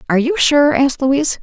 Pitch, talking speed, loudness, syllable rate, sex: 275 Hz, 210 wpm, -14 LUFS, 6.4 syllables/s, female